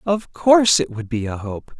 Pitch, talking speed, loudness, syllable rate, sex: 140 Hz, 235 wpm, -18 LUFS, 4.8 syllables/s, male